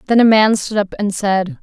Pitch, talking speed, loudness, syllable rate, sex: 210 Hz, 260 wpm, -15 LUFS, 4.9 syllables/s, female